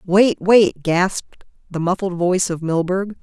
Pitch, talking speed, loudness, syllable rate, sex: 185 Hz, 150 wpm, -18 LUFS, 4.2 syllables/s, female